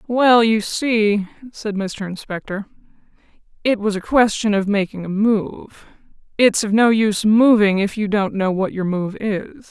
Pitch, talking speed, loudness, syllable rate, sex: 210 Hz, 165 wpm, -18 LUFS, 4.2 syllables/s, female